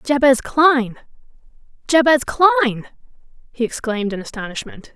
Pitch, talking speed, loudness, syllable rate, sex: 255 Hz, 85 wpm, -17 LUFS, 5.9 syllables/s, female